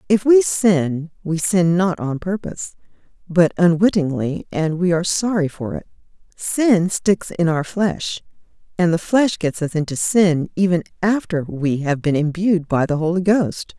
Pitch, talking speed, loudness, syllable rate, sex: 175 Hz, 165 wpm, -19 LUFS, 4.4 syllables/s, female